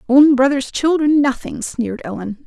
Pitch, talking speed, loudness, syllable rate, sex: 265 Hz, 145 wpm, -17 LUFS, 4.9 syllables/s, female